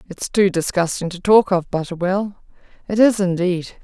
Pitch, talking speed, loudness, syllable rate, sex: 185 Hz, 155 wpm, -18 LUFS, 4.8 syllables/s, female